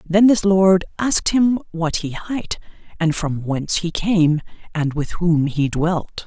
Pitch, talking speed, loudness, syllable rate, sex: 175 Hz, 170 wpm, -19 LUFS, 3.9 syllables/s, female